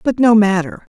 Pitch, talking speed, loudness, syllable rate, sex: 210 Hz, 190 wpm, -13 LUFS, 5.1 syllables/s, female